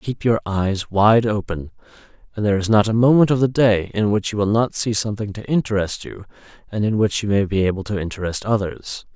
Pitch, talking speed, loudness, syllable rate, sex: 105 Hz, 225 wpm, -19 LUFS, 5.7 syllables/s, male